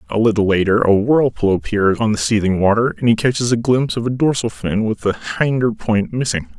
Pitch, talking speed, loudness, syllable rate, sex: 110 Hz, 220 wpm, -17 LUFS, 5.6 syllables/s, male